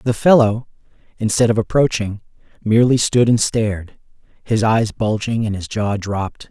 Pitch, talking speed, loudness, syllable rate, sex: 110 Hz, 150 wpm, -17 LUFS, 4.9 syllables/s, male